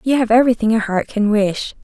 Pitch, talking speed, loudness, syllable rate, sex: 225 Hz, 230 wpm, -16 LUFS, 6.0 syllables/s, female